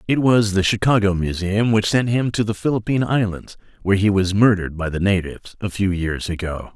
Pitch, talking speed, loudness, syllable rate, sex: 100 Hz, 205 wpm, -19 LUFS, 5.7 syllables/s, male